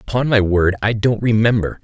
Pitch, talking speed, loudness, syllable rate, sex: 110 Hz, 195 wpm, -16 LUFS, 5.6 syllables/s, male